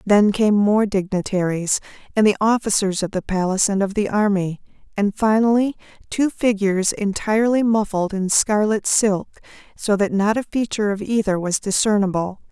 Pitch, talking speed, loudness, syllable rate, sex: 205 Hz, 155 wpm, -19 LUFS, 5.1 syllables/s, female